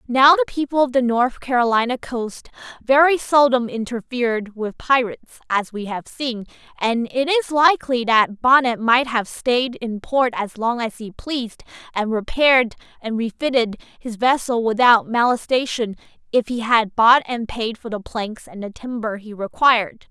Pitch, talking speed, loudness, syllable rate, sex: 240 Hz, 160 wpm, -19 LUFS, 4.5 syllables/s, female